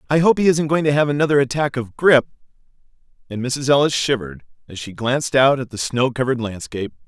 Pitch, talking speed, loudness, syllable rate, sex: 135 Hz, 205 wpm, -18 LUFS, 6.6 syllables/s, male